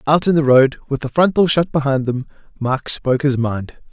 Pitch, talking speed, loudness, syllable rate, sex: 140 Hz, 230 wpm, -17 LUFS, 5.3 syllables/s, male